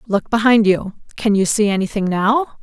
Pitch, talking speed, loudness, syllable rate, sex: 210 Hz, 185 wpm, -16 LUFS, 5.1 syllables/s, female